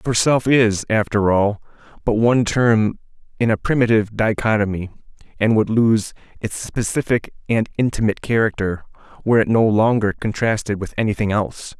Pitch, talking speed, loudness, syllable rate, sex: 110 Hz, 140 wpm, -19 LUFS, 5.3 syllables/s, male